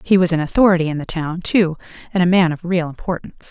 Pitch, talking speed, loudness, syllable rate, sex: 170 Hz, 240 wpm, -18 LUFS, 6.5 syllables/s, female